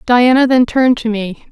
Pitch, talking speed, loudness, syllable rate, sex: 240 Hz, 200 wpm, -12 LUFS, 5.1 syllables/s, female